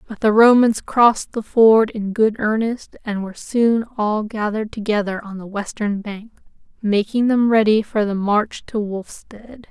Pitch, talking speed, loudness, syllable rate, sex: 215 Hz, 165 wpm, -18 LUFS, 4.4 syllables/s, female